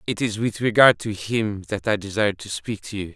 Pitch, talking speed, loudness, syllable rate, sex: 105 Hz, 245 wpm, -22 LUFS, 5.3 syllables/s, male